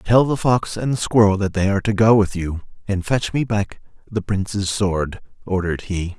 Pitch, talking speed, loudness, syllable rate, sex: 100 Hz, 215 wpm, -20 LUFS, 5.0 syllables/s, male